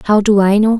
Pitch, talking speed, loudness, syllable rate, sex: 210 Hz, 300 wpm, -12 LUFS, 6.4 syllables/s, female